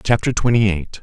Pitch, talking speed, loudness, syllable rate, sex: 105 Hz, 175 wpm, -17 LUFS, 5.4 syllables/s, male